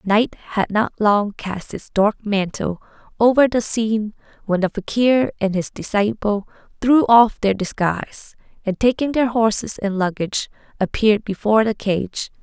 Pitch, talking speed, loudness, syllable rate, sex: 210 Hz, 150 wpm, -19 LUFS, 4.5 syllables/s, female